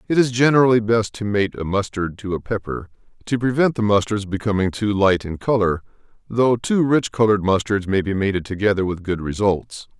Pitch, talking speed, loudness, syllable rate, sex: 105 Hz, 190 wpm, -20 LUFS, 5.5 syllables/s, male